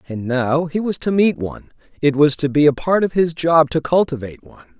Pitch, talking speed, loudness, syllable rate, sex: 150 Hz, 240 wpm, -17 LUFS, 5.7 syllables/s, male